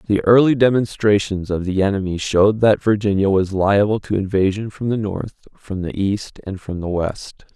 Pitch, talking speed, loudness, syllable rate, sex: 100 Hz, 185 wpm, -18 LUFS, 5.0 syllables/s, male